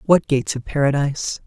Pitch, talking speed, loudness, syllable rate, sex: 140 Hz, 165 wpm, -20 LUFS, 6.2 syllables/s, male